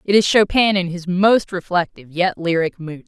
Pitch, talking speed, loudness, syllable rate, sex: 180 Hz, 195 wpm, -18 LUFS, 5.1 syllables/s, female